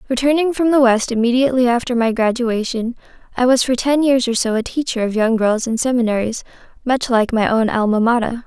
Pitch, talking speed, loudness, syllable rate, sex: 240 Hz, 200 wpm, -17 LUFS, 5.8 syllables/s, female